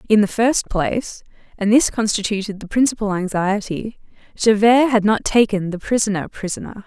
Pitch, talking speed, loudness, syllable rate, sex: 210 Hz, 150 wpm, -18 LUFS, 5.2 syllables/s, female